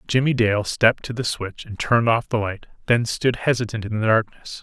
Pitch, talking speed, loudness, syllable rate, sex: 115 Hz, 220 wpm, -21 LUFS, 5.4 syllables/s, male